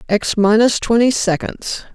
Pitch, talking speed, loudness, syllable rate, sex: 220 Hz, 125 wpm, -16 LUFS, 4.2 syllables/s, female